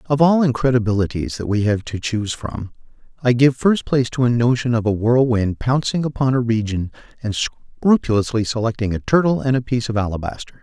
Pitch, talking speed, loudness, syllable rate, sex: 120 Hz, 185 wpm, -19 LUFS, 5.7 syllables/s, male